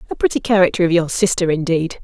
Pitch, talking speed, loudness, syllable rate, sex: 170 Hz, 205 wpm, -17 LUFS, 6.7 syllables/s, female